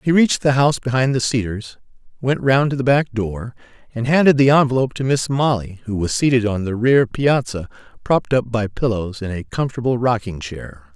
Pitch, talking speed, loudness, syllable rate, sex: 120 Hz, 195 wpm, -18 LUFS, 5.6 syllables/s, male